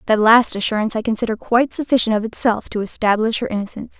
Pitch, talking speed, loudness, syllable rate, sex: 225 Hz, 195 wpm, -18 LUFS, 7.1 syllables/s, female